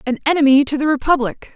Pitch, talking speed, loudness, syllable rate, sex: 280 Hz, 195 wpm, -16 LUFS, 6.6 syllables/s, female